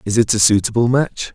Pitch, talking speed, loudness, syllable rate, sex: 115 Hz, 225 wpm, -15 LUFS, 5.7 syllables/s, male